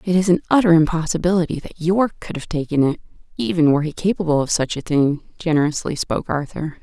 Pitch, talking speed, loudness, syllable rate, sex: 165 Hz, 195 wpm, -19 LUFS, 6.4 syllables/s, female